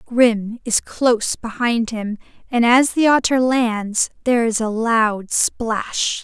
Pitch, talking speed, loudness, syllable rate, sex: 230 Hz, 145 wpm, -18 LUFS, 3.4 syllables/s, female